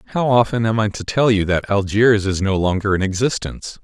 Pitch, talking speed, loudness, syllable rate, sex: 105 Hz, 220 wpm, -18 LUFS, 5.7 syllables/s, male